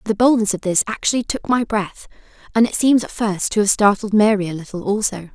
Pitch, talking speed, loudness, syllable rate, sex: 210 Hz, 225 wpm, -18 LUFS, 5.8 syllables/s, female